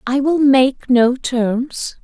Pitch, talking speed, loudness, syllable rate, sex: 260 Hz, 150 wpm, -15 LUFS, 2.7 syllables/s, female